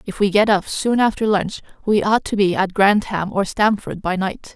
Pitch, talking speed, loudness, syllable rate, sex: 200 Hz, 225 wpm, -18 LUFS, 4.8 syllables/s, female